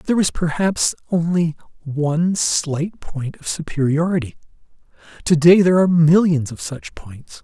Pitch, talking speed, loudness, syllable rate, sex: 160 Hz, 130 wpm, -18 LUFS, 4.6 syllables/s, male